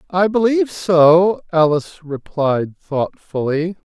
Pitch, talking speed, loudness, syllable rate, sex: 170 Hz, 90 wpm, -17 LUFS, 3.8 syllables/s, male